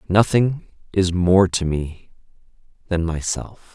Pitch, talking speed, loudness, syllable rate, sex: 90 Hz, 110 wpm, -20 LUFS, 3.5 syllables/s, male